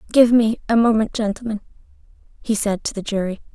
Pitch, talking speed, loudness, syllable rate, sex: 215 Hz, 170 wpm, -19 LUFS, 6.1 syllables/s, female